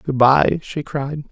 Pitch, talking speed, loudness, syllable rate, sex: 135 Hz, 185 wpm, -18 LUFS, 3.3 syllables/s, male